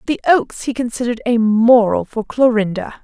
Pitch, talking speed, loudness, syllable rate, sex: 240 Hz, 160 wpm, -16 LUFS, 5.1 syllables/s, female